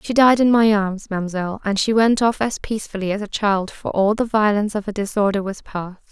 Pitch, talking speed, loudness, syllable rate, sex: 205 Hz, 235 wpm, -19 LUFS, 5.9 syllables/s, female